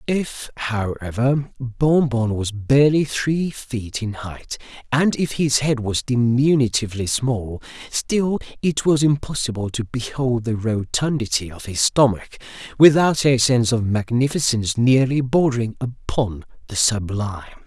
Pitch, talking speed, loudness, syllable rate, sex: 125 Hz, 130 wpm, -20 LUFS, 4.3 syllables/s, male